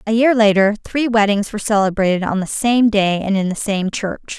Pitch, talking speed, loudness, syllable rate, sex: 210 Hz, 220 wpm, -16 LUFS, 5.3 syllables/s, female